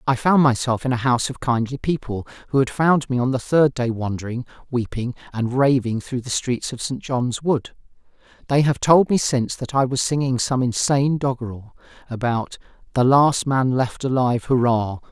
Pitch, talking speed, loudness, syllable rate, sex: 130 Hz, 185 wpm, -20 LUFS, 5.1 syllables/s, male